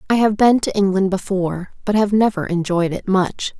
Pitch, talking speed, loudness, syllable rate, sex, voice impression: 195 Hz, 200 wpm, -18 LUFS, 5.2 syllables/s, female, feminine, young, slightly cute, slightly intellectual, sincere, slightly reassuring, slightly elegant, slightly kind